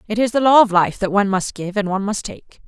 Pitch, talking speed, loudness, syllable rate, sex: 205 Hz, 315 wpm, -17 LUFS, 6.4 syllables/s, female